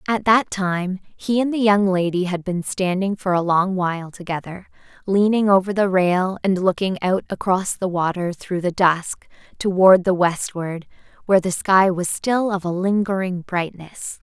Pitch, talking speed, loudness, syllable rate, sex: 185 Hz, 170 wpm, -20 LUFS, 4.5 syllables/s, female